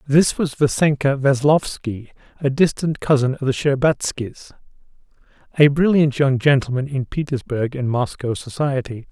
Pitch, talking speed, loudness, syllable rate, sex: 135 Hz, 125 wpm, -19 LUFS, 4.6 syllables/s, male